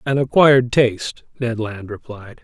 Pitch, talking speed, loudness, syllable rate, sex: 120 Hz, 150 wpm, -17 LUFS, 4.6 syllables/s, male